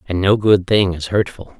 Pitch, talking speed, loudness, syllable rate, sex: 95 Hz, 225 wpm, -16 LUFS, 4.7 syllables/s, male